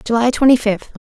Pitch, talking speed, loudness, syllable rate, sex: 235 Hz, 175 wpm, -14 LUFS, 5.6 syllables/s, female